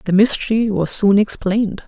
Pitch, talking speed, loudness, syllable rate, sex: 205 Hz, 160 wpm, -17 LUFS, 5.3 syllables/s, female